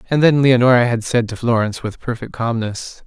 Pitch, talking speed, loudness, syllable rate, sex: 120 Hz, 195 wpm, -17 LUFS, 5.6 syllables/s, male